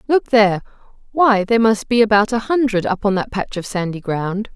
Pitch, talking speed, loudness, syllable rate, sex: 210 Hz, 210 wpm, -17 LUFS, 5.4 syllables/s, female